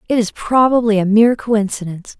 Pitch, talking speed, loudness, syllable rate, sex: 220 Hz, 165 wpm, -15 LUFS, 6.0 syllables/s, female